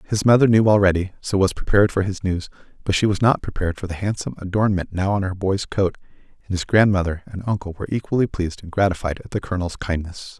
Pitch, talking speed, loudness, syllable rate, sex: 95 Hz, 220 wpm, -21 LUFS, 6.7 syllables/s, male